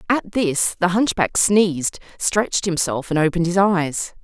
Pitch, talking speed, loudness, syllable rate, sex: 180 Hz, 155 wpm, -19 LUFS, 4.5 syllables/s, female